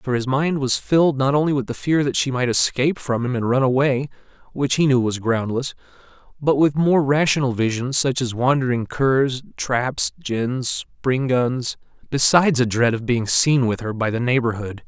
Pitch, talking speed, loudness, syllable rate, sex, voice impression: 130 Hz, 195 wpm, -20 LUFS, 4.8 syllables/s, male, very masculine, very adult-like, thick, tensed, powerful, bright, hard, clear, fluent, cool, intellectual, slightly refreshing, very sincere, slightly calm, slightly friendly, slightly reassuring, slightly unique, slightly elegant, wild, slightly sweet, lively, slightly kind, intense